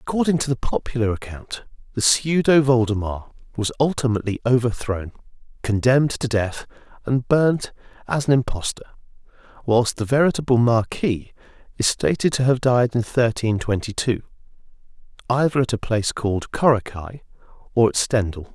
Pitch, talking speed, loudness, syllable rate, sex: 120 Hz, 135 wpm, -21 LUFS, 5.3 syllables/s, male